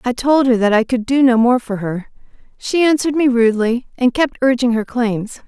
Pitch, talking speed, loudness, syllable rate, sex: 245 Hz, 220 wpm, -16 LUFS, 5.3 syllables/s, female